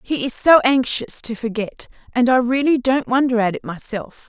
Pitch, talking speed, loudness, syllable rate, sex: 245 Hz, 195 wpm, -18 LUFS, 4.9 syllables/s, female